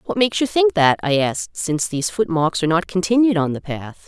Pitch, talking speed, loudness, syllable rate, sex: 170 Hz, 235 wpm, -19 LUFS, 6.2 syllables/s, female